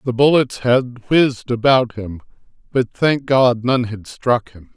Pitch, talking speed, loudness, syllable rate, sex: 120 Hz, 165 wpm, -17 LUFS, 3.9 syllables/s, male